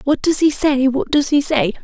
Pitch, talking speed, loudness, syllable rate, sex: 280 Hz, 260 wpm, -16 LUFS, 4.8 syllables/s, female